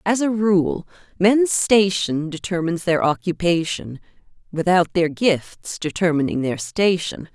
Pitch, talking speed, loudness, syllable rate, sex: 175 Hz, 115 wpm, -20 LUFS, 4.1 syllables/s, female